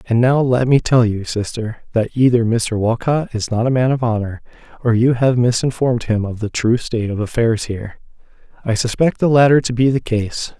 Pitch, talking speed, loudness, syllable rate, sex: 120 Hz, 210 wpm, -17 LUFS, 5.3 syllables/s, male